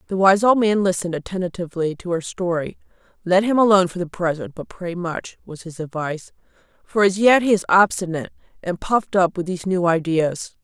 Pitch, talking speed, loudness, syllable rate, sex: 180 Hz, 190 wpm, -20 LUFS, 5.8 syllables/s, female